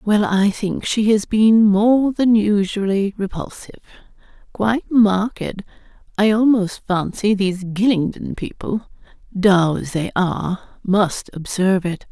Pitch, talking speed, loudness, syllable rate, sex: 200 Hz, 120 wpm, -18 LUFS, 4.1 syllables/s, female